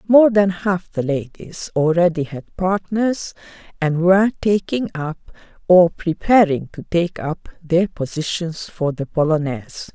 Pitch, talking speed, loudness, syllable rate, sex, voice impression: 175 Hz, 135 wpm, -19 LUFS, 4.0 syllables/s, female, very feminine, slightly old, very thin, slightly tensed, weak, slightly bright, soft, clear, slightly halting, slightly raspy, slightly cool, intellectual, refreshing, very sincere, very calm, friendly, slightly reassuring, unique, very elegant, slightly wild, sweet, slightly lively, kind, modest